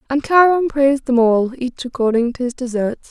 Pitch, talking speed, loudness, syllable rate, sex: 260 Hz, 195 wpm, -17 LUFS, 5.2 syllables/s, female